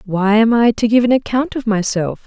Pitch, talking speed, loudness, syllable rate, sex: 225 Hz, 240 wpm, -15 LUFS, 5.1 syllables/s, female